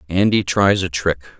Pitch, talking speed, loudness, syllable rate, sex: 90 Hz, 170 wpm, -17 LUFS, 4.9 syllables/s, male